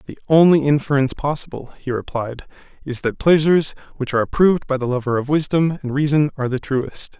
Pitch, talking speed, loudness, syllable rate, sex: 140 Hz, 185 wpm, -19 LUFS, 6.1 syllables/s, male